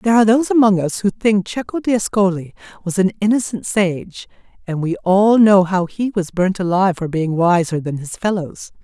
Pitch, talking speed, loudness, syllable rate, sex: 195 Hz, 185 wpm, -17 LUFS, 5.2 syllables/s, female